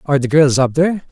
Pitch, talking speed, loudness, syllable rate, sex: 145 Hz, 270 wpm, -14 LUFS, 7.1 syllables/s, male